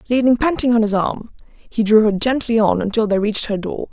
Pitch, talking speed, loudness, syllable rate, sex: 220 Hz, 230 wpm, -17 LUFS, 5.6 syllables/s, female